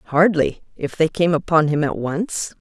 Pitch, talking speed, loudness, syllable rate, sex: 160 Hz, 185 wpm, -19 LUFS, 4.2 syllables/s, female